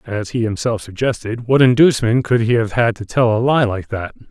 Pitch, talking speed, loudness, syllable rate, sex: 115 Hz, 225 wpm, -17 LUFS, 5.4 syllables/s, male